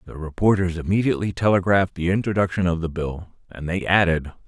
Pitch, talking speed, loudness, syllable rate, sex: 90 Hz, 150 wpm, -21 LUFS, 6.3 syllables/s, male